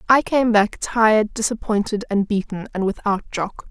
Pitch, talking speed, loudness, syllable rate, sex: 215 Hz, 160 wpm, -20 LUFS, 4.8 syllables/s, female